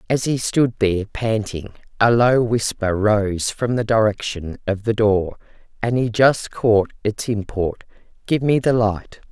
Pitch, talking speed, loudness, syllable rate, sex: 110 Hz, 160 wpm, -19 LUFS, 4.1 syllables/s, female